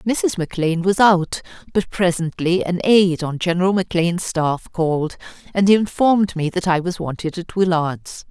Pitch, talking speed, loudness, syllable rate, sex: 180 Hz, 160 wpm, -19 LUFS, 4.7 syllables/s, female